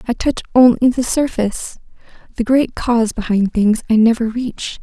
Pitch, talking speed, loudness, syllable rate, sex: 235 Hz, 160 wpm, -16 LUFS, 5.0 syllables/s, female